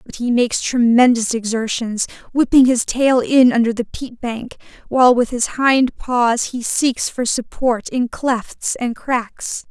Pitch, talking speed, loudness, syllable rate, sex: 240 Hz, 160 wpm, -17 LUFS, 3.9 syllables/s, female